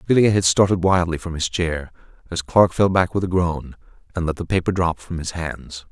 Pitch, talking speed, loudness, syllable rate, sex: 90 Hz, 225 wpm, -20 LUFS, 5.4 syllables/s, male